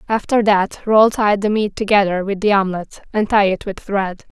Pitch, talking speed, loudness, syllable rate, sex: 205 Hz, 205 wpm, -17 LUFS, 5.0 syllables/s, female